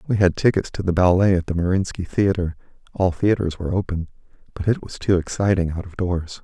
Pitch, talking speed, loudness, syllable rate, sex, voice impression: 90 Hz, 185 wpm, -21 LUFS, 5.9 syllables/s, male, masculine, adult-like, slightly relaxed, slightly weak, soft, muffled, fluent, intellectual, sincere, calm, unique, slightly wild, modest